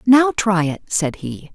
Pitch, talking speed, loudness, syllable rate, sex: 200 Hz, 195 wpm, -18 LUFS, 3.6 syllables/s, female